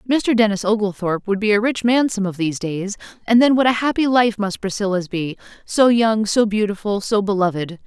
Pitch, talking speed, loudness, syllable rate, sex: 210 Hz, 200 wpm, -18 LUFS, 5.5 syllables/s, female